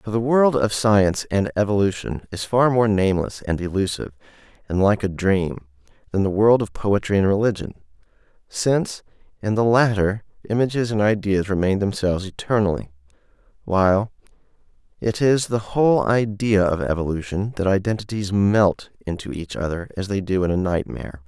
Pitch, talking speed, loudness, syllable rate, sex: 100 Hz, 150 wpm, -21 LUFS, 5.3 syllables/s, male